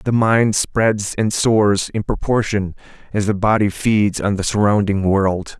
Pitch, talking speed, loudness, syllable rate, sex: 105 Hz, 160 wpm, -17 LUFS, 3.9 syllables/s, male